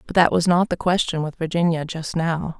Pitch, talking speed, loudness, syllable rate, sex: 170 Hz, 230 wpm, -21 LUFS, 5.3 syllables/s, female